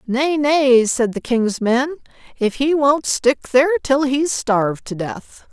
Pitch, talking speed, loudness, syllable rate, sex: 265 Hz, 175 wpm, -17 LUFS, 3.7 syllables/s, female